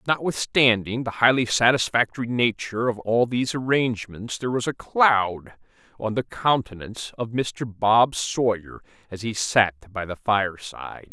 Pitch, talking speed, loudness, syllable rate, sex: 115 Hz, 140 wpm, -23 LUFS, 4.8 syllables/s, male